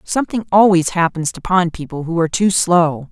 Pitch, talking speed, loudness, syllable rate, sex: 175 Hz, 195 wpm, -16 LUFS, 5.4 syllables/s, female